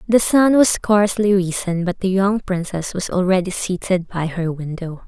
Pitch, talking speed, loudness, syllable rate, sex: 185 Hz, 175 wpm, -18 LUFS, 4.7 syllables/s, female